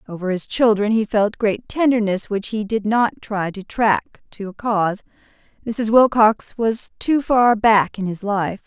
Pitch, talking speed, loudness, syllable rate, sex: 215 Hz, 180 wpm, -19 LUFS, 4.3 syllables/s, female